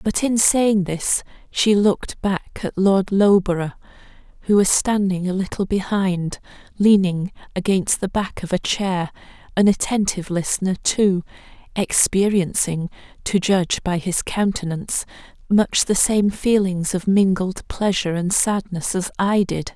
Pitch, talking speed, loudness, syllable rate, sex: 190 Hz, 135 wpm, -20 LUFS, 4.3 syllables/s, female